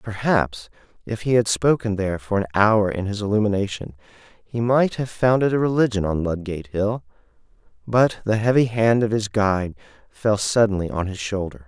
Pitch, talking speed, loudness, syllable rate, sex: 105 Hz, 170 wpm, -21 LUFS, 5.2 syllables/s, male